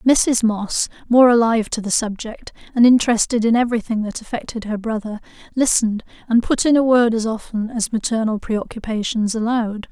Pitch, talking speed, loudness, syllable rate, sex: 225 Hz, 165 wpm, -18 LUFS, 5.5 syllables/s, female